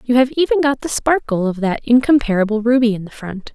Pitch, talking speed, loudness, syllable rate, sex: 235 Hz, 220 wpm, -16 LUFS, 5.9 syllables/s, female